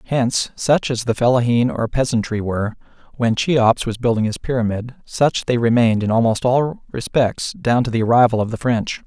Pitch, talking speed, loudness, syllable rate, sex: 120 Hz, 185 wpm, -18 LUFS, 5.1 syllables/s, male